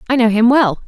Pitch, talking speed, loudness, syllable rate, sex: 235 Hz, 275 wpm, -13 LUFS, 6.1 syllables/s, female